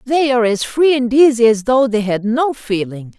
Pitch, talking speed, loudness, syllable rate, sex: 240 Hz, 225 wpm, -14 LUFS, 4.9 syllables/s, female